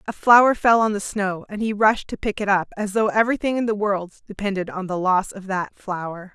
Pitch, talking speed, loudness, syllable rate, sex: 200 Hz, 245 wpm, -21 LUFS, 5.6 syllables/s, female